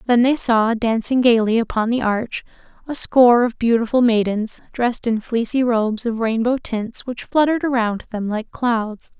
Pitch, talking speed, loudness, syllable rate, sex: 235 Hz, 170 wpm, -19 LUFS, 4.8 syllables/s, female